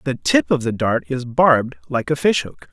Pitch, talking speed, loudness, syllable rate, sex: 130 Hz, 220 wpm, -18 LUFS, 5.0 syllables/s, male